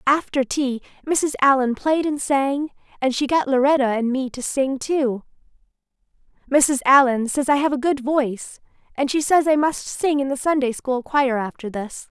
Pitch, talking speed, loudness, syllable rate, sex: 270 Hz, 180 wpm, -20 LUFS, 4.6 syllables/s, female